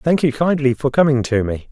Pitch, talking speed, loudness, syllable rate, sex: 135 Hz, 245 wpm, -17 LUFS, 5.6 syllables/s, male